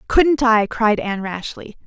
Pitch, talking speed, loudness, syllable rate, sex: 230 Hz, 160 wpm, -18 LUFS, 4.3 syllables/s, female